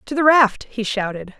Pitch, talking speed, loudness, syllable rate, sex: 235 Hz, 215 wpm, -18 LUFS, 4.9 syllables/s, female